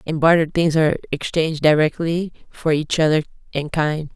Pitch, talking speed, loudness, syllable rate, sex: 155 Hz, 160 wpm, -19 LUFS, 5.3 syllables/s, female